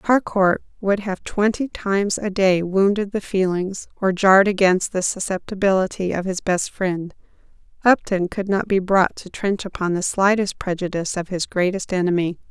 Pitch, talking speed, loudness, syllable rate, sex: 190 Hz, 165 wpm, -20 LUFS, 4.8 syllables/s, female